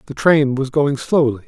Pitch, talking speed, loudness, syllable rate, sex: 140 Hz, 205 wpm, -16 LUFS, 4.7 syllables/s, male